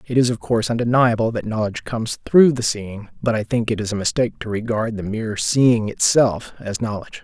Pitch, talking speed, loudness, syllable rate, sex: 115 Hz, 215 wpm, -20 LUFS, 5.8 syllables/s, male